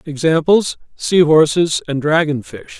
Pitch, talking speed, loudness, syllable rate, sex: 155 Hz, 85 wpm, -15 LUFS, 4.1 syllables/s, male